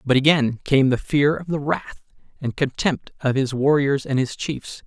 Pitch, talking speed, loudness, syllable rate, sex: 135 Hz, 195 wpm, -21 LUFS, 4.4 syllables/s, male